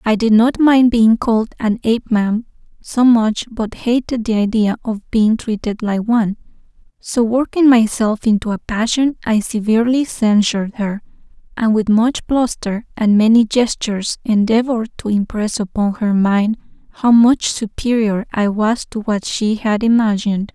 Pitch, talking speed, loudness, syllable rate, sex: 220 Hz, 150 wpm, -16 LUFS, 4.6 syllables/s, female